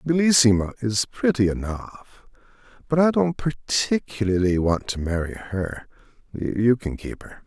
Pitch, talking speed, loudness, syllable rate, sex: 115 Hz, 120 wpm, -22 LUFS, 4.3 syllables/s, male